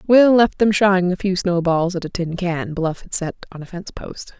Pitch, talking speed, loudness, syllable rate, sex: 185 Hz, 245 wpm, -18 LUFS, 4.8 syllables/s, female